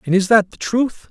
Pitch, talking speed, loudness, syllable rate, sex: 210 Hz, 270 wpm, -17 LUFS, 5.0 syllables/s, male